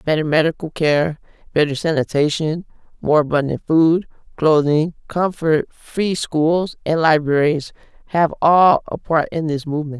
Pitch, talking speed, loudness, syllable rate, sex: 155 Hz, 125 wpm, -18 LUFS, 4.4 syllables/s, female